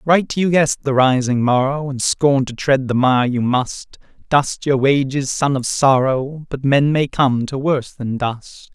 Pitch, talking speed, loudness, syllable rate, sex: 135 Hz, 190 wpm, -17 LUFS, 4.2 syllables/s, male